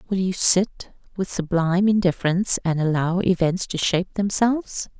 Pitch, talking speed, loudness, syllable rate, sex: 185 Hz, 145 wpm, -21 LUFS, 5.2 syllables/s, female